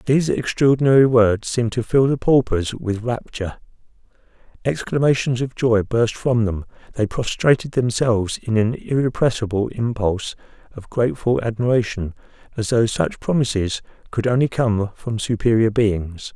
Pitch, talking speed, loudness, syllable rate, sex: 115 Hz, 130 wpm, -20 LUFS, 4.9 syllables/s, male